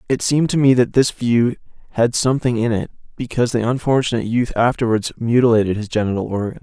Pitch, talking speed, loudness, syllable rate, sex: 120 Hz, 180 wpm, -18 LUFS, 6.4 syllables/s, male